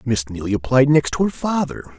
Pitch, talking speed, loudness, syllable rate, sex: 125 Hz, 210 wpm, -19 LUFS, 5.7 syllables/s, male